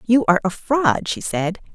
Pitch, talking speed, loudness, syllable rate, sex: 210 Hz, 205 wpm, -20 LUFS, 4.7 syllables/s, female